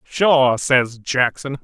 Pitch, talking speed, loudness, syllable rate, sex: 135 Hz, 110 wpm, -17 LUFS, 2.6 syllables/s, male